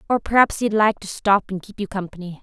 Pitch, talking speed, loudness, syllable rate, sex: 200 Hz, 250 wpm, -20 LUFS, 5.8 syllables/s, female